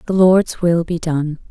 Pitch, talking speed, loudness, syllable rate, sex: 170 Hz, 200 wpm, -16 LUFS, 4.0 syllables/s, female